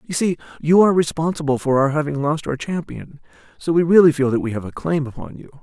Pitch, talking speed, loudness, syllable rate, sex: 150 Hz, 235 wpm, -19 LUFS, 6.3 syllables/s, male